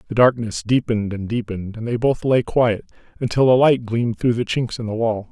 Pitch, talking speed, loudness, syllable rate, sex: 115 Hz, 225 wpm, -20 LUFS, 5.7 syllables/s, male